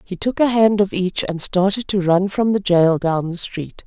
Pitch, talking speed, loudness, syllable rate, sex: 190 Hz, 250 wpm, -18 LUFS, 4.5 syllables/s, female